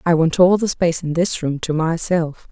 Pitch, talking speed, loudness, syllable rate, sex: 170 Hz, 240 wpm, -18 LUFS, 5.0 syllables/s, female